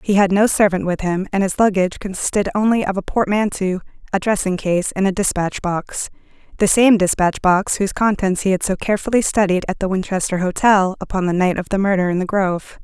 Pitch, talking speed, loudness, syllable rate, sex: 195 Hz, 210 wpm, -18 LUFS, 5.8 syllables/s, female